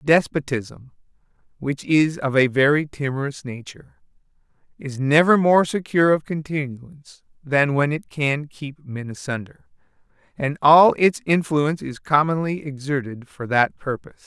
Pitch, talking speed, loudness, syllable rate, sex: 145 Hz, 130 wpm, -20 LUFS, 4.6 syllables/s, male